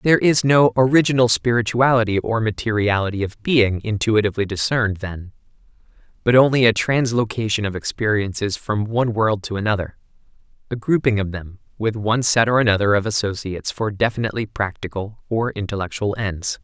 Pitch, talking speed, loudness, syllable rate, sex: 110 Hz, 145 wpm, -19 LUFS, 5.7 syllables/s, male